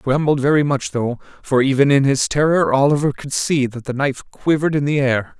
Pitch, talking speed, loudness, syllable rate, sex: 140 Hz, 225 wpm, -17 LUFS, 5.8 syllables/s, male